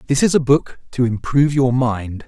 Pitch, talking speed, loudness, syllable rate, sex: 130 Hz, 210 wpm, -17 LUFS, 5.0 syllables/s, male